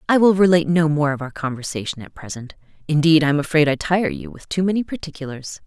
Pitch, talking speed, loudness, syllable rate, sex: 155 Hz, 220 wpm, -19 LUFS, 6.4 syllables/s, female